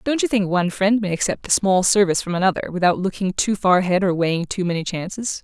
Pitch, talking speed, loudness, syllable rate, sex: 190 Hz, 245 wpm, -20 LUFS, 6.4 syllables/s, female